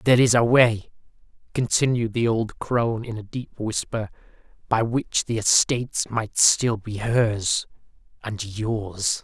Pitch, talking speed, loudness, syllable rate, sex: 115 Hz, 145 wpm, -22 LUFS, 4.0 syllables/s, male